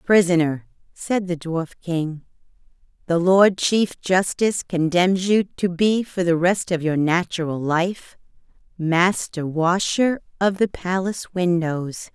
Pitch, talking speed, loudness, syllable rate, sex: 180 Hz, 130 wpm, -21 LUFS, 3.9 syllables/s, female